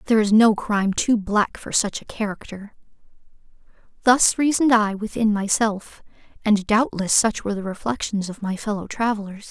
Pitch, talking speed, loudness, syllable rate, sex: 210 Hz, 160 wpm, -21 LUFS, 5.2 syllables/s, female